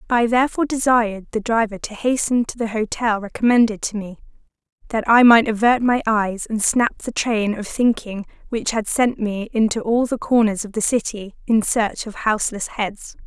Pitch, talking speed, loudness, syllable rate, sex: 225 Hz, 185 wpm, -19 LUFS, 5.0 syllables/s, female